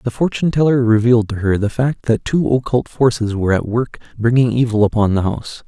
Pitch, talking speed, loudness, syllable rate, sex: 120 Hz, 210 wpm, -16 LUFS, 6.0 syllables/s, male